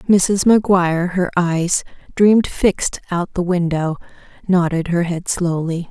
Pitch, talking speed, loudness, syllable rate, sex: 180 Hz, 130 wpm, -17 LUFS, 4.5 syllables/s, female